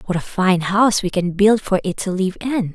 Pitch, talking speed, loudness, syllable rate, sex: 195 Hz, 265 wpm, -18 LUFS, 5.2 syllables/s, female